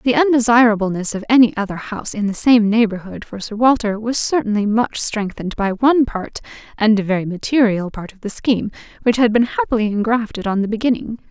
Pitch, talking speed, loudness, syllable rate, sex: 220 Hz, 190 wpm, -17 LUFS, 5.9 syllables/s, female